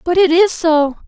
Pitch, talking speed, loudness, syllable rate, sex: 335 Hz, 225 wpm, -13 LUFS, 4.4 syllables/s, female